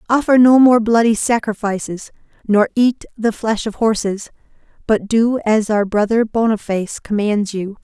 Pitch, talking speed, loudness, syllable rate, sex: 220 Hz, 145 wpm, -16 LUFS, 4.7 syllables/s, female